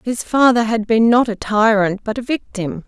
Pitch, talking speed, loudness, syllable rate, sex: 225 Hz, 210 wpm, -16 LUFS, 4.8 syllables/s, female